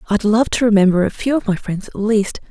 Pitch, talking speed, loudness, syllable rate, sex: 210 Hz, 265 wpm, -17 LUFS, 5.7 syllables/s, female